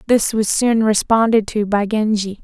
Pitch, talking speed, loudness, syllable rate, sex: 215 Hz, 175 wpm, -16 LUFS, 4.4 syllables/s, female